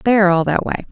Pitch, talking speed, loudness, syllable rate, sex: 190 Hz, 330 wpm, -16 LUFS, 7.8 syllables/s, female